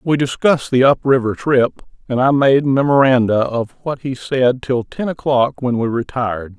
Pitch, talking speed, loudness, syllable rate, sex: 130 Hz, 180 wpm, -16 LUFS, 4.7 syllables/s, male